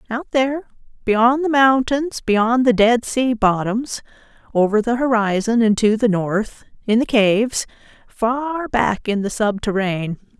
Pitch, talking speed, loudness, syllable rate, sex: 230 Hz, 145 wpm, -18 LUFS, 4.2 syllables/s, female